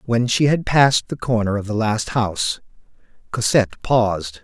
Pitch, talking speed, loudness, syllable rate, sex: 115 Hz, 165 wpm, -19 LUFS, 5.0 syllables/s, male